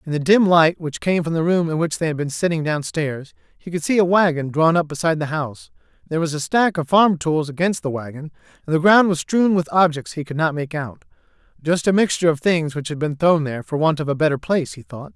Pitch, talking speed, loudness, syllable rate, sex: 160 Hz, 260 wpm, -19 LUFS, 6.0 syllables/s, male